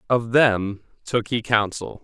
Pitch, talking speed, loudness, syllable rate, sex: 110 Hz, 145 wpm, -21 LUFS, 3.6 syllables/s, male